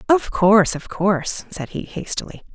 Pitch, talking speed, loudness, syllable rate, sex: 195 Hz, 165 wpm, -20 LUFS, 4.9 syllables/s, female